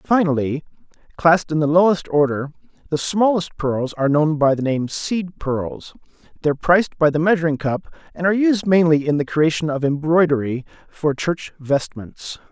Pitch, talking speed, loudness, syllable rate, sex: 155 Hz, 165 wpm, -19 LUFS, 5.0 syllables/s, male